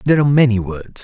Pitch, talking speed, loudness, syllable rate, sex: 120 Hz, 235 wpm, -14 LUFS, 7.7 syllables/s, male